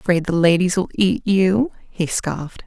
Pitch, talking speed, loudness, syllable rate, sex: 185 Hz, 180 wpm, -19 LUFS, 4.0 syllables/s, female